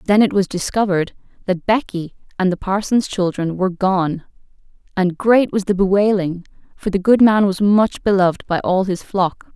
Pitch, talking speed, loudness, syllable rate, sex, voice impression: 190 Hz, 175 wpm, -17 LUFS, 5.0 syllables/s, female, feminine, adult-like, slightly fluent, intellectual, slightly calm, slightly sweet